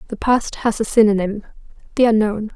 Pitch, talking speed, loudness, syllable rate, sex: 215 Hz, 165 wpm, -17 LUFS, 5.7 syllables/s, female